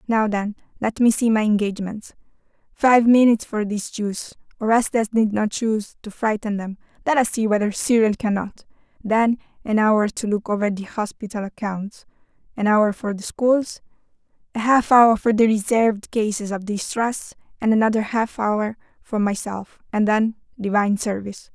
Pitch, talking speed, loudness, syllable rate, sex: 215 Hz, 160 wpm, -21 LUFS, 5.0 syllables/s, female